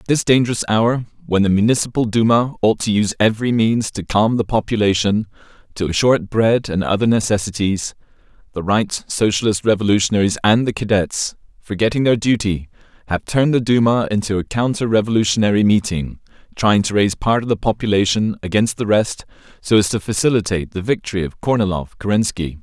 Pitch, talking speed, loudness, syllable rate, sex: 105 Hz, 165 wpm, -17 LUFS, 5.9 syllables/s, male